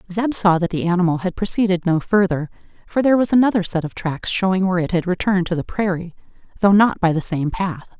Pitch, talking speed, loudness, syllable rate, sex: 185 Hz, 220 wpm, -19 LUFS, 6.3 syllables/s, female